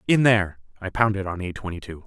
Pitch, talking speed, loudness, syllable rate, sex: 100 Hz, 230 wpm, -23 LUFS, 6.5 syllables/s, male